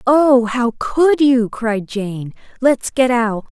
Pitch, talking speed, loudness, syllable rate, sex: 240 Hz, 150 wpm, -16 LUFS, 2.9 syllables/s, female